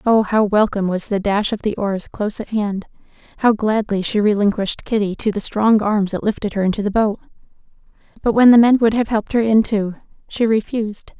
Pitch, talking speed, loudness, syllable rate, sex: 210 Hz, 210 wpm, -18 LUFS, 5.7 syllables/s, female